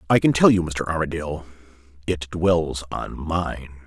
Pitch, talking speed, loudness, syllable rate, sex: 80 Hz, 155 wpm, -22 LUFS, 4.6 syllables/s, male